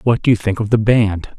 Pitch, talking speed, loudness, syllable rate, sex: 110 Hz, 305 wpm, -16 LUFS, 5.4 syllables/s, male